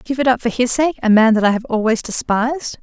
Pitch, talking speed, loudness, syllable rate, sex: 240 Hz, 255 wpm, -16 LUFS, 6.0 syllables/s, female